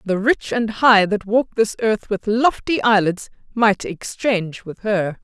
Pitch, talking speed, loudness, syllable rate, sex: 210 Hz, 170 wpm, -18 LUFS, 4.0 syllables/s, female